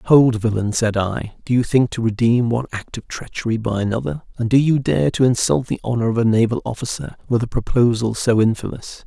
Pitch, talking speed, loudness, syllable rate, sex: 115 Hz, 210 wpm, -19 LUFS, 5.6 syllables/s, male